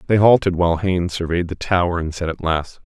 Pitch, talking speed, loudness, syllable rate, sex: 90 Hz, 225 wpm, -19 LUFS, 6.0 syllables/s, male